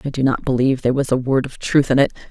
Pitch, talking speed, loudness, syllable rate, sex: 130 Hz, 315 wpm, -18 LUFS, 7.3 syllables/s, female